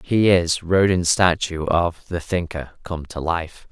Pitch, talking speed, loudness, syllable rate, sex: 85 Hz, 160 wpm, -20 LUFS, 3.8 syllables/s, male